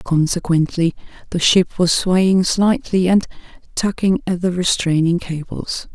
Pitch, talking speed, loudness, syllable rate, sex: 180 Hz, 120 wpm, -17 LUFS, 4.2 syllables/s, female